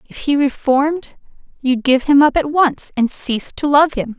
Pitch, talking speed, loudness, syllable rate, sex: 275 Hz, 200 wpm, -16 LUFS, 4.7 syllables/s, female